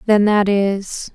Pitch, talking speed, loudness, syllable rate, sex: 200 Hz, 155 wpm, -16 LUFS, 3.1 syllables/s, female